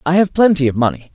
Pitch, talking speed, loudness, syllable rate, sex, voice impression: 155 Hz, 260 wpm, -15 LUFS, 6.7 syllables/s, male, very masculine, slightly young, slightly adult-like, very thick, slightly tensed, slightly relaxed, slightly weak, dark, hard, muffled, slightly halting, cool, intellectual, slightly refreshing, sincere, calm, mature, slightly friendly, slightly reassuring, very unique, wild, slightly sweet, slightly lively, kind